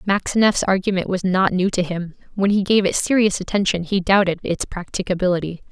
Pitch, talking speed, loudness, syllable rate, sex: 190 Hz, 180 wpm, -19 LUFS, 5.7 syllables/s, female